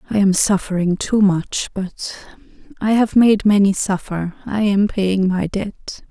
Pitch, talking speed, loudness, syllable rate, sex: 200 Hz, 145 wpm, -17 LUFS, 3.8 syllables/s, female